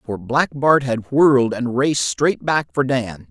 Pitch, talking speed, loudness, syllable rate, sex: 125 Hz, 200 wpm, -18 LUFS, 4.2 syllables/s, male